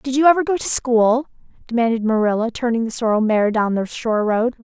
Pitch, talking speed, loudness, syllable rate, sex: 235 Hz, 205 wpm, -18 LUFS, 5.8 syllables/s, female